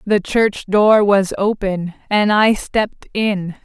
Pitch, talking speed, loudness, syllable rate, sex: 200 Hz, 150 wpm, -16 LUFS, 3.4 syllables/s, female